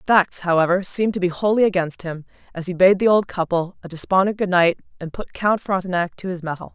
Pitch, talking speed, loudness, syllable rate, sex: 185 Hz, 230 wpm, -20 LUFS, 6.2 syllables/s, female